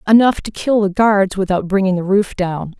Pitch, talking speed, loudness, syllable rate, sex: 195 Hz, 215 wpm, -16 LUFS, 5.0 syllables/s, female